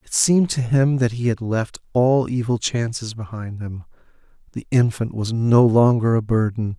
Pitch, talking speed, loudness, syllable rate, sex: 115 Hz, 175 wpm, -20 LUFS, 4.7 syllables/s, male